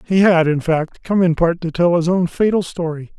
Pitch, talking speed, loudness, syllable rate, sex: 170 Hz, 245 wpm, -17 LUFS, 5.1 syllables/s, male